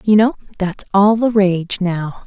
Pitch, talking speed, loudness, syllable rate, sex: 200 Hz, 185 wpm, -16 LUFS, 3.8 syllables/s, female